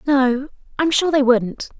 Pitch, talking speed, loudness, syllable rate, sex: 270 Hz, 165 wpm, -18 LUFS, 3.9 syllables/s, female